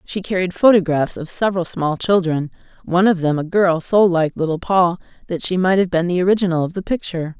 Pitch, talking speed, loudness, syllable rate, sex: 175 Hz, 210 wpm, -18 LUFS, 5.9 syllables/s, female